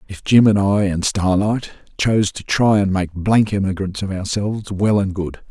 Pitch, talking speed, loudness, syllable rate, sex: 100 Hz, 195 wpm, -18 LUFS, 4.8 syllables/s, male